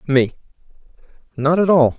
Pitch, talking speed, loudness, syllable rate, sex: 150 Hz, 120 wpm, -17 LUFS, 4.8 syllables/s, male